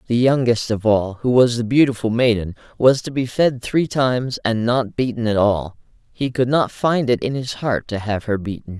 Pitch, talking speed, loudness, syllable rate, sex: 120 Hz, 220 wpm, -19 LUFS, 4.9 syllables/s, male